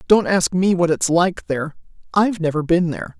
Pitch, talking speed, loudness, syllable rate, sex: 175 Hz, 205 wpm, -18 LUFS, 5.6 syllables/s, female